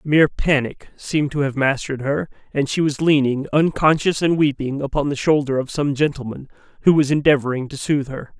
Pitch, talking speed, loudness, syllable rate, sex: 140 Hz, 185 wpm, -19 LUFS, 5.7 syllables/s, male